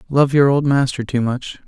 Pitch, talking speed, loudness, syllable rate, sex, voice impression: 135 Hz, 215 wpm, -17 LUFS, 4.9 syllables/s, male, masculine, adult-like, slightly relaxed, slightly dark, soft, slightly muffled, sincere, calm, reassuring, slightly sweet, kind, modest